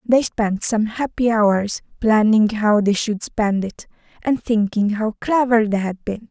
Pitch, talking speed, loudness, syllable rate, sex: 220 Hz, 170 wpm, -19 LUFS, 3.9 syllables/s, female